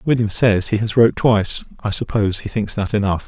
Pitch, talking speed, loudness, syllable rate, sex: 105 Hz, 220 wpm, -18 LUFS, 5.9 syllables/s, male